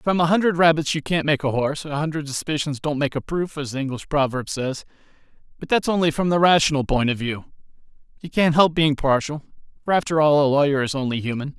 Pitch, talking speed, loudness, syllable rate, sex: 150 Hz, 215 wpm, -21 LUFS, 6.1 syllables/s, male